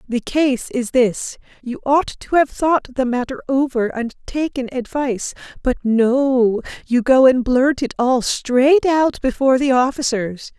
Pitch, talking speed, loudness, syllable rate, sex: 255 Hz, 160 wpm, -18 LUFS, 4.0 syllables/s, female